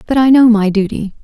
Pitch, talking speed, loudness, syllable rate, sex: 225 Hz, 245 wpm, -11 LUFS, 5.8 syllables/s, female